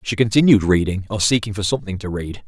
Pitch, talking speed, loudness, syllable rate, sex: 105 Hz, 220 wpm, -18 LUFS, 6.4 syllables/s, male